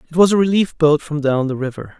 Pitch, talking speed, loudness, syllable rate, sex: 155 Hz, 270 wpm, -17 LUFS, 6.2 syllables/s, male